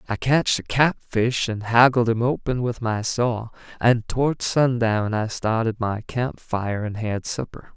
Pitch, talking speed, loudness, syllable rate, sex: 115 Hz, 170 wpm, -22 LUFS, 4.2 syllables/s, male